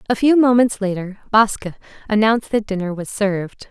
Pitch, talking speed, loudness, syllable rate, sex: 210 Hz, 160 wpm, -18 LUFS, 5.3 syllables/s, female